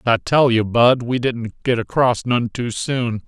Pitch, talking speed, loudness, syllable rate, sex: 120 Hz, 220 wpm, -18 LUFS, 4.2 syllables/s, male